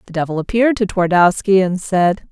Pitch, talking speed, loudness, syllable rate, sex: 190 Hz, 180 wpm, -16 LUFS, 5.7 syllables/s, female